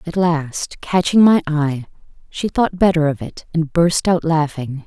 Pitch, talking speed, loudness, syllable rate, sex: 165 Hz, 175 wpm, -17 LUFS, 4.0 syllables/s, female